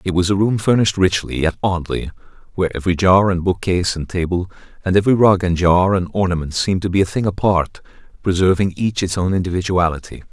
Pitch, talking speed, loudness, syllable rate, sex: 95 Hz, 190 wpm, -17 LUFS, 6.3 syllables/s, male